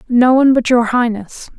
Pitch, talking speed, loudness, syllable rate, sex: 240 Hz, 190 wpm, -13 LUFS, 5.1 syllables/s, female